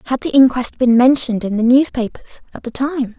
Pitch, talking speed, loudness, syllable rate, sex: 250 Hz, 205 wpm, -15 LUFS, 5.6 syllables/s, female